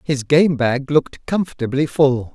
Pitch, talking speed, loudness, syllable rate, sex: 140 Hz, 155 wpm, -18 LUFS, 4.4 syllables/s, male